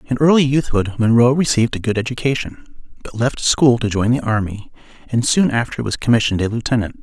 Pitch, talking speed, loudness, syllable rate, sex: 120 Hz, 190 wpm, -17 LUFS, 5.9 syllables/s, male